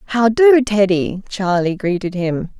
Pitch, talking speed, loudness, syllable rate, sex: 200 Hz, 140 wpm, -16 LUFS, 3.7 syllables/s, female